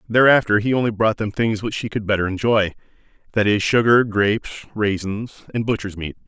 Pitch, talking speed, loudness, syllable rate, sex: 110 Hz, 180 wpm, -19 LUFS, 5.5 syllables/s, male